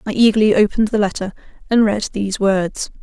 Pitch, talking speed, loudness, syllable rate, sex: 205 Hz, 180 wpm, -17 LUFS, 6.2 syllables/s, female